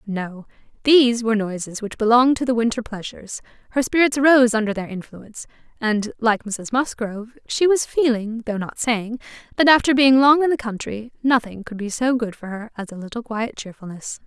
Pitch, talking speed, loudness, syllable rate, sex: 230 Hz, 190 wpm, -20 LUFS, 5.4 syllables/s, female